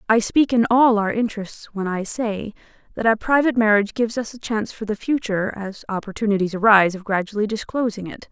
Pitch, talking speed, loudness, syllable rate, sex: 215 Hz, 195 wpm, -20 LUFS, 6.2 syllables/s, female